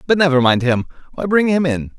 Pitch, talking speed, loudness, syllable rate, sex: 150 Hz, 240 wpm, -16 LUFS, 6.0 syllables/s, male